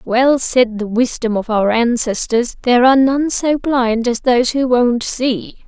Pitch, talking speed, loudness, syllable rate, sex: 240 Hz, 170 wpm, -15 LUFS, 4.2 syllables/s, female